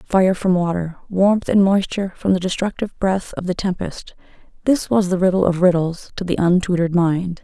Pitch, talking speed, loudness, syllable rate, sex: 185 Hz, 185 wpm, -19 LUFS, 5.3 syllables/s, female